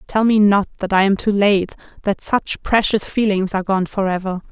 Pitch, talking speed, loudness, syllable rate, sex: 200 Hz, 215 wpm, -18 LUFS, 4.9 syllables/s, female